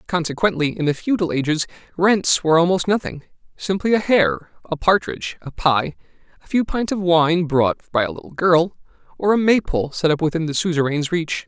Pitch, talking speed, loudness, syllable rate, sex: 170 Hz, 180 wpm, -19 LUFS, 5.5 syllables/s, male